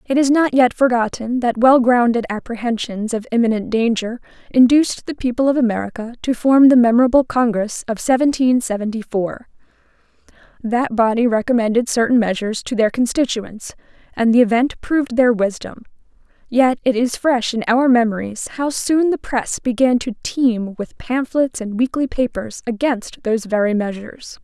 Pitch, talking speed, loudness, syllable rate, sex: 240 Hz, 155 wpm, -17 LUFS, 5.1 syllables/s, female